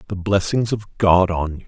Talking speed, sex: 215 wpm, male